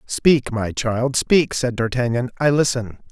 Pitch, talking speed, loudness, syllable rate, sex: 125 Hz, 155 wpm, -19 LUFS, 3.9 syllables/s, male